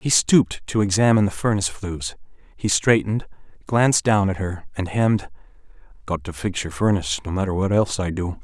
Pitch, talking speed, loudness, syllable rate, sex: 95 Hz, 185 wpm, -21 LUFS, 6.0 syllables/s, male